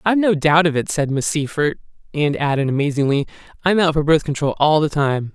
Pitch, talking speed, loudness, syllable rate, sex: 150 Hz, 215 wpm, -18 LUFS, 5.8 syllables/s, male